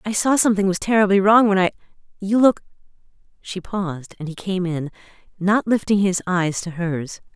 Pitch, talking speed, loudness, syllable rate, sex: 190 Hz, 170 wpm, -19 LUFS, 5.3 syllables/s, female